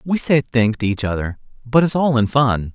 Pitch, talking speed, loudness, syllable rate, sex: 125 Hz, 240 wpm, -18 LUFS, 5.0 syllables/s, male